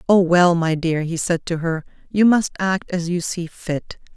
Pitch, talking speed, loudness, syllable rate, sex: 175 Hz, 215 wpm, -20 LUFS, 4.3 syllables/s, female